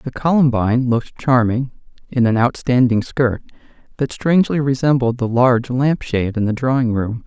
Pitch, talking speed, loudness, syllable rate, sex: 125 Hz, 155 wpm, -17 LUFS, 5.3 syllables/s, male